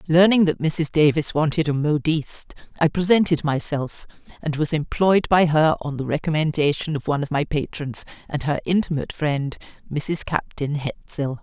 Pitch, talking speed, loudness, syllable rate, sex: 155 Hz, 160 wpm, -21 LUFS, 5.2 syllables/s, female